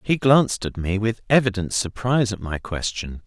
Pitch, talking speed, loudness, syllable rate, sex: 105 Hz, 185 wpm, -22 LUFS, 5.2 syllables/s, male